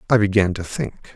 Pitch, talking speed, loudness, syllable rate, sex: 105 Hz, 205 wpm, -21 LUFS, 5.4 syllables/s, male